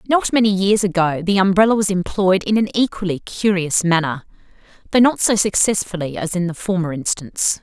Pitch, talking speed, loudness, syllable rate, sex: 190 Hz, 175 wpm, -18 LUFS, 5.5 syllables/s, female